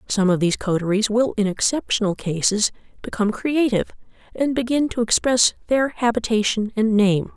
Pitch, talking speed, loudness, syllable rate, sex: 220 Hz, 145 wpm, -20 LUFS, 5.4 syllables/s, female